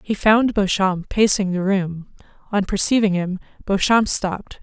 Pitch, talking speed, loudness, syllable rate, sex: 195 Hz, 145 wpm, -19 LUFS, 4.4 syllables/s, female